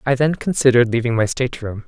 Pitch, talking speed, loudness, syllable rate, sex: 125 Hz, 190 wpm, -18 LUFS, 6.9 syllables/s, male